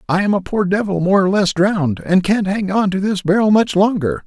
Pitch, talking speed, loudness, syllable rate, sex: 195 Hz, 255 wpm, -16 LUFS, 5.4 syllables/s, male